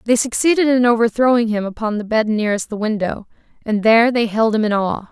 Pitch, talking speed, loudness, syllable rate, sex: 225 Hz, 210 wpm, -17 LUFS, 6.0 syllables/s, female